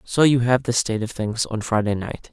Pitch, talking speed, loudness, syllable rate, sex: 115 Hz, 260 wpm, -21 LUFS, 5.4 syllables/s, male